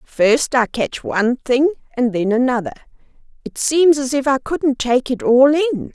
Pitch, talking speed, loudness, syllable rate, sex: 260 Hz, 180 wpm, -17 LUFS, 4.7 syllables/s, female